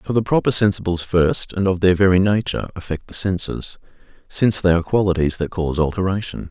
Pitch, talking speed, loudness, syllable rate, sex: 95 Hz, 185 wpm, -19 LUFS, 6.2 syllables/s, male